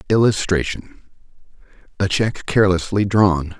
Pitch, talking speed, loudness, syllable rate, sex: 100 Hz, 85 wpm, -18 LUFS, 4.8 syllables/s, male